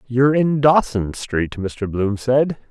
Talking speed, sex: 155 wpm, male